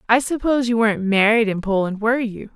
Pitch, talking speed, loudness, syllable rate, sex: 225 Hz, 210 wpm, -19 LUFS, 6.4 syllables/s, female